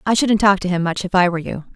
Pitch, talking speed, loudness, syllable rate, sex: 190 Hz, 345 wpm, -17 LUFS, 7.0 syllables/s, female